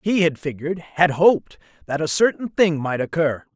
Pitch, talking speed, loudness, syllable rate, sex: 160 Hz, 150 wpm, -20 LUFS, 5.1 syllables/s, male